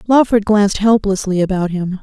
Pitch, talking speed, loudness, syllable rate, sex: 200 Hz, 150 wpm, -15 LUFS, 5.4 syllables/s, female